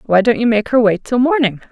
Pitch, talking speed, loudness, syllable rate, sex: 230 Hz, 280 wpm, -14 LUFS, 5.6 syllables/s, female